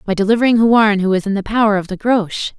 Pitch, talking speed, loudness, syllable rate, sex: 210 Hz, 255 wpm, -15 LUFS, 6.9 syllables/s, female